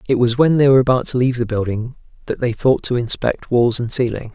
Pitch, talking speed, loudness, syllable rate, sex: 125 Hz, 250 wpm, -17 LUFS, 6.2 syllables/s, male